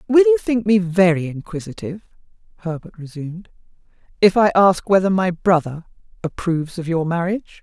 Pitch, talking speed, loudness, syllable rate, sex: 185 Hz, 140 wpm, -18 LUFS, 5.6 syllables/s, female